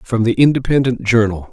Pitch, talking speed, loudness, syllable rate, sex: 120 Hz, 160 wpm, -15 LUFS, 5.4 syllables/s, male